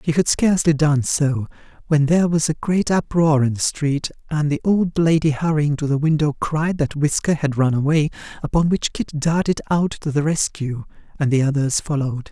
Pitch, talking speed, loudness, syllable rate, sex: 150 Hz, 195 wpm, -19 LUFS, 5.1 syllables/s, male